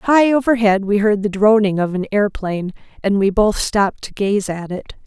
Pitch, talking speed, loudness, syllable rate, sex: 205 Hz, 200 wpm, -17 LUFS, 5.4 syllables/s, female